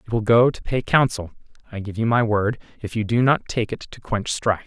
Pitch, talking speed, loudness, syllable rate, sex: 110 Hz, 255 wpm, -21 LUFS, 5.7 syllables/s, male